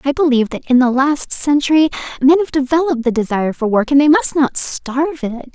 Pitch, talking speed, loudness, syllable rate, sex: 275 Hz, 215 wpm, -15 LUFS, 5.9 syllables/s, female